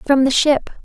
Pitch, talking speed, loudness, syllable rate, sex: 275 Hz, 215 wpm, -15 LUFS, 4.2 syllables/s, female